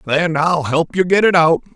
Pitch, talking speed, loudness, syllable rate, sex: 165 Hz, 240 wpm, -15 LUFS, 4.7 syllables/s, male